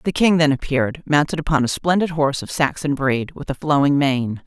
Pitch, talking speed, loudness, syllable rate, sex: 145 Hz, 215 wpm, -19 LUFS, 5.6 syllables/s, female